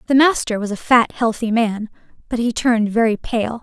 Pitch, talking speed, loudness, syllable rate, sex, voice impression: 230 Hz, 200 wpm, -18 LUFS, 5.2 syllables/s, female, feminine, slightly young, slightly tensed, powerful, slightly soft, clear, raspy, intellectual, slightly refreshing, friendly, elegant, lively, slightly sharp